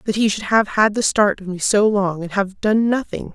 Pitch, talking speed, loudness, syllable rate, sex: 205 Hz, 270 wpm, -18 LUFS, 5.0 syllables/s, female